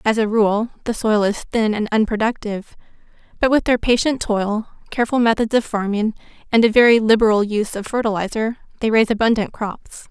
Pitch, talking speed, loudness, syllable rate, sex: 220 Hz, 170 wpm, -18 LUFS, 5.8 syllables/s, female